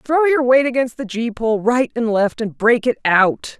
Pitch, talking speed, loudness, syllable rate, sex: 240 Hz, 235 wpm, -17 LUFS, 4.4 syllables/s, female